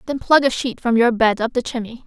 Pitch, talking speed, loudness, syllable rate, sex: 240 Hz, 290 wpm, -18 LUFS, 5.8 syllables/s, female